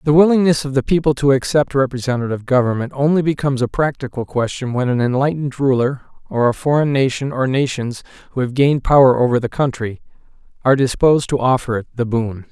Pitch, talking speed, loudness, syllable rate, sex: 130 Hz, 180 wpm, -17 LUFS, 6.4 syllables/s, male